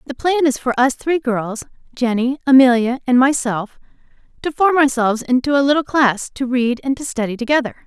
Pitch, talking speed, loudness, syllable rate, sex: 260 Hz, 185 wpm, -17 LUFS, 5.4 syllables/s, female